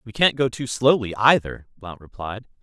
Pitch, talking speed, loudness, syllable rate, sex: 115 Hz, 185 wpm, -20 LUFS, 4.8 syllables/s, male